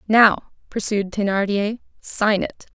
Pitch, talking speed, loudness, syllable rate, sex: 205 Hz, 105 wpm, -20 LUFS, 3.7 syllables/s, female